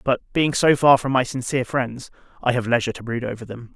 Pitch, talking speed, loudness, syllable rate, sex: 125 Hz, 240 wpm, -21 LUFS, 6.2 syllables/s, male